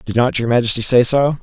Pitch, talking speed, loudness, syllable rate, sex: 125 Hz, 255 wpm, -15 LUFS, 6.1 syllables/s, male